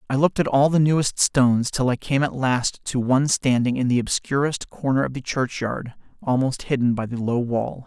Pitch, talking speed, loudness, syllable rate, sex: 130 Hz, 215 wpm, -22 LUFS, 5.3 syllables/s, male